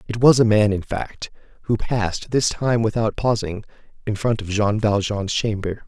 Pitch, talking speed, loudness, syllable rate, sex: 110 Hz, 185 wpm, -21 LUFS, 4.7 syllables/s, male